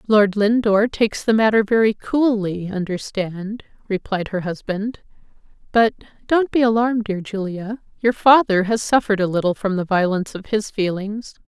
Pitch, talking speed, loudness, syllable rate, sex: 210 Hz, 140 wpm, -19 LUFS, 5.0 syllables/s, female